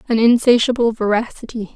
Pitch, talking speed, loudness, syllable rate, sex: 230 Hz, 100 wpm, -15 LUFS, 5.8 syllables/s, female